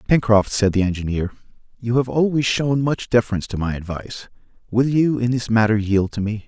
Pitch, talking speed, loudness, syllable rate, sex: 115 Hz, 195 wpm, -20 LUFS, 5.7 syllables/s, male